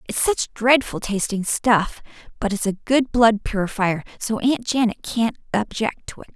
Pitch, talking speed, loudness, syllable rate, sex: 225 Hz, 160 wpm, -21 LUFS, 4.4 syllables/s, female